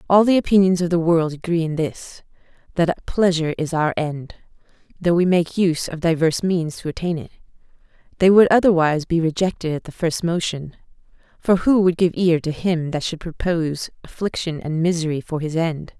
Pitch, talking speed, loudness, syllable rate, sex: 170 Hz, 185 wpm, -20 LUFS, 5.3 syllables/s, female